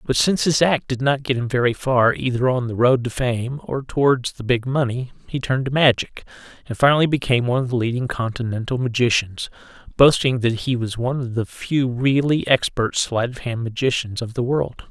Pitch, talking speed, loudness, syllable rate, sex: 125 Hz, 200 wpm, -20 LUFS, 5.5 syllables/s, male